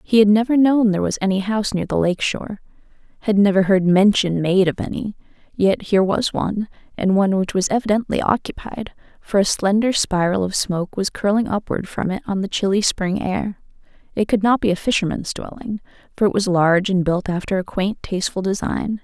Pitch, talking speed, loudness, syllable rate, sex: 200 Hz, 195 wpm, -19 LUFS, 5.7 syllables/s, female